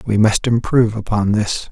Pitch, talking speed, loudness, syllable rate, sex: 110 Hz, 175 wpm, -16 LUFS, 5.2 syllables/s, male